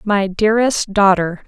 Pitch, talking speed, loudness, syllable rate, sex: 200 Hz, 120 wpm, -15 LUFS, 4.4 syllables/s, female